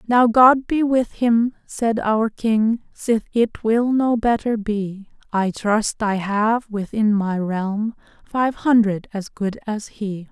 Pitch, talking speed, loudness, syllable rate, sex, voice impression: 220 Hz, 155 wpm, -20 LUFS, 3.4 syllables/s, female, feminine, adult-like, slightly soft, slightly calm, slightly elegant, slightly kind